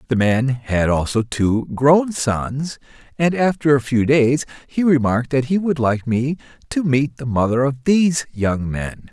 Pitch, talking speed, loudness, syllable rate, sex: 135 Hz, 180 wpm, -19 LUFS, 4.2 syllables/s, male